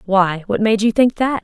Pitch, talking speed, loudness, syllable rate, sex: 210 Hz, 250 wpm, -16 LUFS, 4.6 syllables/s, female